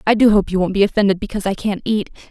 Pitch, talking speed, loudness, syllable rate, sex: 200 Hz, 285 wpm, -17 LUFS, 7.6 syllables/s, female